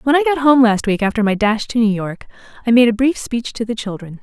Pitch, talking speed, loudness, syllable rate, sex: 230 Hz, 285 wpm, -16 LUFS, 5.9 syllables/s, female